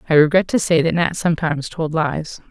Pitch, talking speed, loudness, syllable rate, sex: 160 Hz, 215 wpm, -18 LUFS, 5.8 syllables/s, female